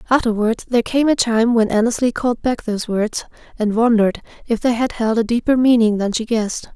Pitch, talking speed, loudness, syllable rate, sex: 230 Hz, 205 wpm, -17 LUFS, 5.9 syllables/s, female